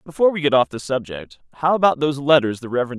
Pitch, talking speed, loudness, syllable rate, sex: 135 Hz, 240 wpm, -19 LUFS, 6.8 syllables/s, male